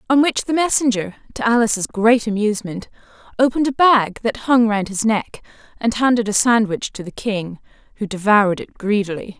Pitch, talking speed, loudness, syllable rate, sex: 220 Hz, 170 wpm, -18 LUFS, 5.4 syllables/s, female